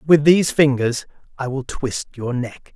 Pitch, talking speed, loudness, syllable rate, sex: 135 Hz, 175 wpm, -19 LUFS, 4.4 syllables/s, male